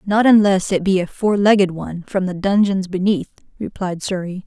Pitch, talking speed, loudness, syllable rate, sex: 190 Hz, 190 wpm, -18 LUFS, 5.2 syllables/s, female